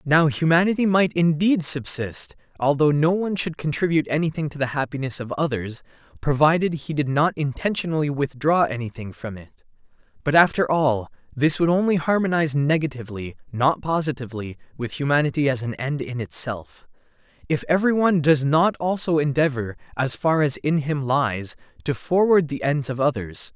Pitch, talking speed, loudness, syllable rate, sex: 145 Hz, 155 wpm, -22 LUFS, 5.4 syllables/s, male